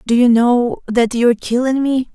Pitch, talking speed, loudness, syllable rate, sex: 240 Hz, 225 wpm, -15 LUFS, 5.2 syllables/s, female